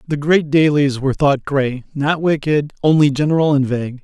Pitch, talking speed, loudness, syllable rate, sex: 145 Hz, 165 wpm, -16 LUFS, 5.2 syllables/s, male